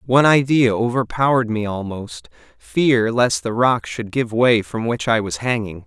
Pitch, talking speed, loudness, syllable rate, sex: 115 Hz, 175 wpm, -18 LUFS, 4.6 syllables/s, male